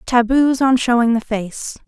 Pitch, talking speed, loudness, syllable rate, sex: 240 Hz, 160 wpm, -16 LUFS, 4.1 syllables/s, female